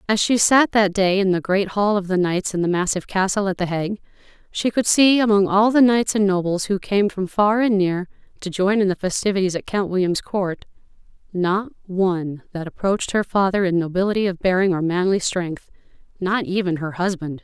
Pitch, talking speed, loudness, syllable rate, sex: 190 Hz, 205 wpm, -20 LUFS, 5.4 syllables/s, female